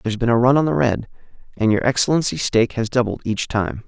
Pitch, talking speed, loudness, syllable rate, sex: 115 Hz, 230 wpm, -19 LUFS, 6.4 syllables/s, male